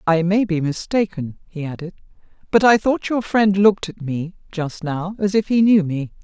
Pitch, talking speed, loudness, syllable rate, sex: 185 Hz, 200 wpm, -19 LUFS, 4.8 syllables/s, female